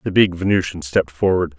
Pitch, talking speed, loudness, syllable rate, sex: 85 Hz, 190 wpm, -18 LUFS, 6.1 syllables/s, male